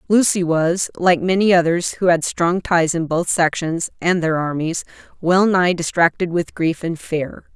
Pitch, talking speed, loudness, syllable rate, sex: 170 Hz, 175 wpm, -18 LUFS, 4.3 syllables/s, female